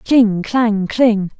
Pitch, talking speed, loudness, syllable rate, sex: 220 Hz, 130 wpm, -15 LUFS, 2.3 syllables/s, female